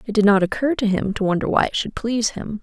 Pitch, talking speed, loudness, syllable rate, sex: 215 Hz, 295 wpm, -20 LUFS, 6.4 syllables/s, female